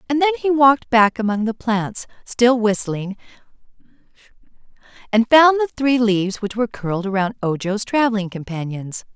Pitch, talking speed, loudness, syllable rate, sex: 225 Hz, 145 wpm, -18 LUFS, 5.1 syllables/s, female